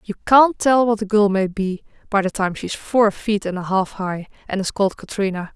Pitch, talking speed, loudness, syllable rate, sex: 205 Hz, 240 wpm, -19 LUFS, 5.1 syllables/s, female